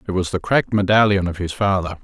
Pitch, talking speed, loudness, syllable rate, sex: 95 Hz, 235 wpm, -18 LUFS, 6.6 syllables/s, male